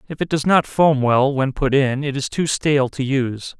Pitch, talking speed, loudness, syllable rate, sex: 140 Hz, 250 wpm, -18 LUFS, 5.0 syllables/s, male